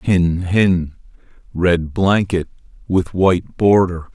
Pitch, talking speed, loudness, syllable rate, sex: 90 Hz, 100 wpm, -17 LUFS, 3.3 syllables/s, male